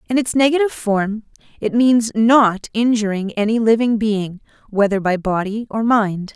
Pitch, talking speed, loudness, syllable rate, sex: 220 Hz, 150 wpm, -17 LUFS, 4.6 syllables/s, female